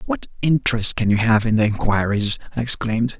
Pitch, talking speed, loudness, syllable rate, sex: 115 Hz, 190 wpm, -19 LUFS, 5.8 syllables/s, male